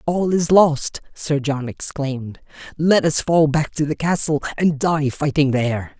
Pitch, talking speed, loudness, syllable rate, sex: 150 Hz, 170 wpm, -19 LUFS, 4.3 syllables/s, male